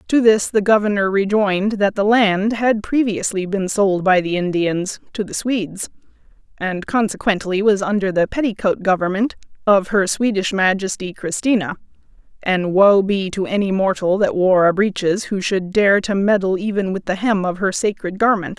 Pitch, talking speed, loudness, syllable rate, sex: 200 Hz, 170 wpm, -18 LUFS, 4.8 syllables/s, female